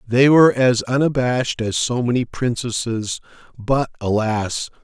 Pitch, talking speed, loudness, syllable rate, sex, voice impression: 120 Hz, 125 wpm, -19 LUFS, 4.4 syllables/s, male, very masculine, middle-aged, very thick, slightly relaxed, powerful, slightly dark, slightly hard, clear, fluent, cool, slightly intellectual, refreshing, very sincere, calm, very mature, slightly friendly, slightly reassuring, unique, slightly elegant, wild, slightly sweet, slightly lively, kind, slightly modest